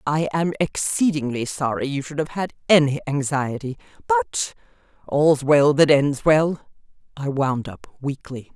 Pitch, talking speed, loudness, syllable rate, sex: 145 Hz, 135 wpm, -21 LUFS, 4.2 syllables/s, female